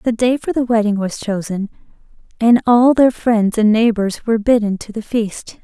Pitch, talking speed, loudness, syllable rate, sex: 220 Hz, 190 wpm, -16 LUFS, 4.8 syllables/s, female